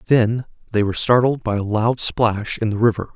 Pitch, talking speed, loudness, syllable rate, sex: 115 Hz, 210 wpm, -19 LUFS, 5.3 syllables/s, male